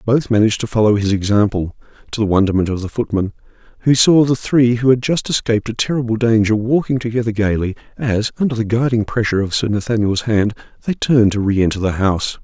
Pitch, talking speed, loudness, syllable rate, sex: 110 Hz, 205 wpm, -16 LUFS, 6.3 syllables/s, male